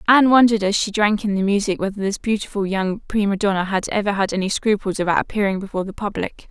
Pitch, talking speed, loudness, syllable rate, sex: 200 Hz, 220 wpm, -20 LUFS, 6.6 syllables/s, female